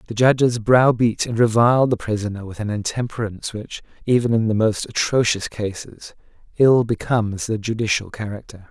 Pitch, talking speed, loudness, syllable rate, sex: 110 Hz, 150 wpm, -20 LUFS, 5.3 syllables/s, male